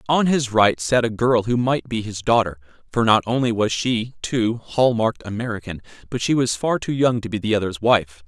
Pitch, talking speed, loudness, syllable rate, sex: 110 Hz, 225 wpm, -20 LUFS, 5.1 syllables/s, male